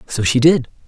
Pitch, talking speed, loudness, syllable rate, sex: 135 Hz, 205 wpm, -15 LUFS, 5.4 syllables/s, male